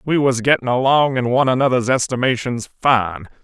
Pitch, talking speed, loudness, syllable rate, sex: 125 Hz, 155 wpm, -17 LUFS, 5.5 syllables/s, male